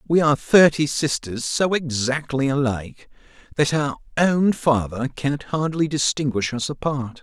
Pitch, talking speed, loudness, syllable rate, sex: 140 Hz, 135 wpm, -21 LUFS, 4.5 syllables/s, male